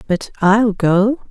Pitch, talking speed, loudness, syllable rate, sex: 205 Hz, 140 wpm, -15 LUFS, 3.1 syllables/s, female